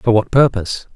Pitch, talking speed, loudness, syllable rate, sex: 110 Hz, 190 wpm, -16 LUFS, 5.8 syllables/s, male